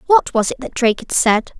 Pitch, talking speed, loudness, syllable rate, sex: 255 Hz, 265 wpm, -17 LUFS, 6.0 syllables/s, female